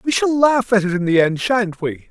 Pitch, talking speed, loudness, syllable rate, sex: 210 Hz, 285 wpm, -17 LUFS, 5.0 syllables/s, male